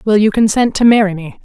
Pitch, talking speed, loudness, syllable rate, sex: 210 Hz, 250 wpm, -12 LUFS, 6.0 syllables/s, female